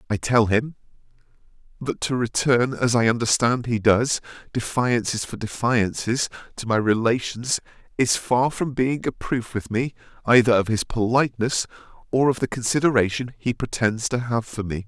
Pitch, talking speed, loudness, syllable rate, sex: 120 Hz, 155 wpm, -22 LUFS, 4.8 syllables/s, male